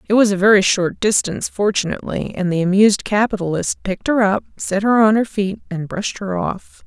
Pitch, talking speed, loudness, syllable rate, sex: 200 Hz, 200 wpm, -17 LUFS, 5.7 syllables/s, female